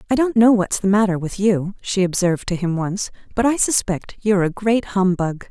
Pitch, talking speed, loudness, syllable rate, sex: 200 Hz, 220 wpm, -19 LUFS, 5.3 syllables/s, female